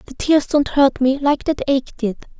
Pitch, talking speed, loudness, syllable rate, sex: 275 Hz, 225 wpm, -18 LUFS, 4.7 syllables/s, female